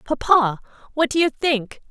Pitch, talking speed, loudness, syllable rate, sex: 275 Hz, 155 wpm, -19 LUFS, 4.4 syllables/s, female